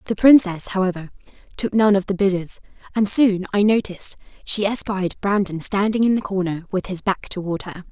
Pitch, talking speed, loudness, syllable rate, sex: 195 Hz, 180 wpm, -20 LUFS, 5.4 syllables/s, female